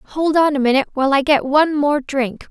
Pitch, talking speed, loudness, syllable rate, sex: 285 Hz, 240 wpm, -16 LUFS, 5.9 syllables/s, female